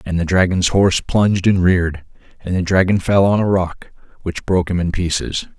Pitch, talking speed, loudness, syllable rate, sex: 90 Hz, 205 wpm, -17 LUFS, 5.5 syllables/s, male